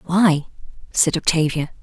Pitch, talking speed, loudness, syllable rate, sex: 165 Hz, 100 wpm, -19 LUFS, 4.3 syllables/s, female